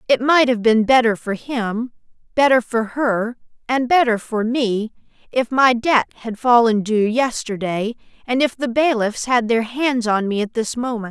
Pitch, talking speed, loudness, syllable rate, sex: 235 Hz, 180 wpm, -18 LUFS, 4.4 syllables/s, female